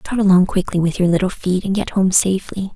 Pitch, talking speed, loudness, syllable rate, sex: 185 Hz, 240 wpm, -17 LUFS, 6.1 syllables/s, female